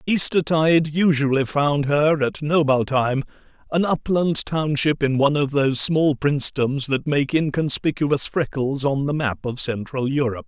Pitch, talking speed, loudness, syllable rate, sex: 145 Hz, 145 wpm, -20 LUFS, 4.6 syllables/s, male